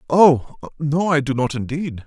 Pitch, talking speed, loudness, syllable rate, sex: 145 Hz, 175 wpm, -19 LUFS, 3.9 syllables/s, male